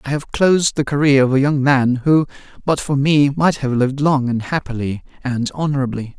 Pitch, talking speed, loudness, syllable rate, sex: 140 Hz, 205 wpm, -17 LUFS, 5.3 syllables/s, male